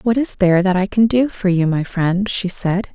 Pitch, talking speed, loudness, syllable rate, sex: 195 Hz, 265 wpm, -17 LUFS, 4.9 syllables/s, female